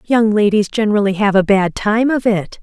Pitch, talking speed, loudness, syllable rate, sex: 210 Hz, 205 wpm, -15 LUFS, 5.1 syllables/s, female